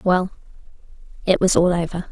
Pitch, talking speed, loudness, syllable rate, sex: 180 Hz, 140 wpm, -20 LUFS, 5.6 syllables/s, female